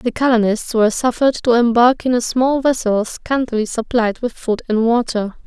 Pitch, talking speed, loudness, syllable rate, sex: 235 Hz, 175 wpm, -17 LUFS, 5.1 syllables/s, female